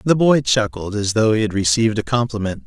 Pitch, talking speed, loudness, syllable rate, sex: 110 Hz, 225 wpm, -18 LUFS, 5.9 syllables/s, male